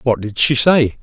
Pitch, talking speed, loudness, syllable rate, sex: 125 Hz, 235 wpm, -14 LUFS, 4.4 syllables/s, male